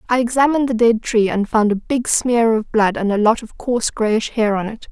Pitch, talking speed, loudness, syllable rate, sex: 225 Hz, 255 wpm, -17 LUFS, 5.3 syllables/s, female